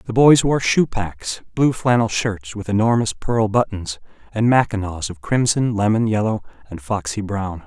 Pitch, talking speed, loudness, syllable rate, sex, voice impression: 110 Hz, 165 wpm, -19 LUFS, 4.5 syllables/s, male, very masculine, adult-like, slightly middle-aged, thick, tensed, powerful, bright, slightly soft, slightly muffled, slightly fluent, cool, very intellectual, very refreshing, sincere, very calm, slightly mature, friendly, reassuring, unique, elegant, slightly wild, sweet, very lively, kind, slightly intense